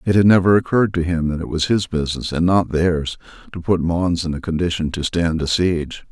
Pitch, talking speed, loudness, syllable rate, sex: 85 Hz, 235 wpm, -19 LUFS, 5.7 syllables/s, male